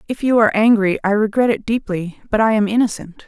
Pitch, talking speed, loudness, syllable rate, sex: 215 Hz, 220 wpm, -17 LUFS, 6.1 syllables/s, female